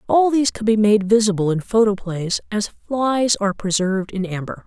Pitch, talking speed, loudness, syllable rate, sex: 210 Hz, 180 wpm, -19 LUFS, 5.2 syllables/s, female